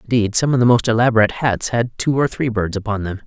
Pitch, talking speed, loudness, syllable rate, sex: 115 Hz, 260 wpm, -17 LUFS, 6.6 syllables/s, male